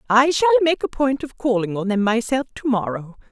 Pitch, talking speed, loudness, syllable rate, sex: 230 Hz, 200 wpm, -20 LUFS, 5.1 syllables/s, female